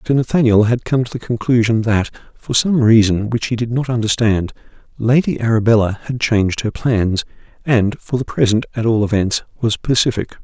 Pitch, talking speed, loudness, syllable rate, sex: 115 Hz, 180 wpm, -16 LUFS, 5.4 syllables/s, male